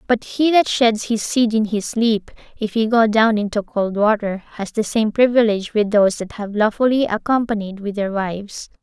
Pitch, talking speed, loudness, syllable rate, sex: 215 Hz, 195 wpm, -18 LUFS, 4.9 syllables/s, female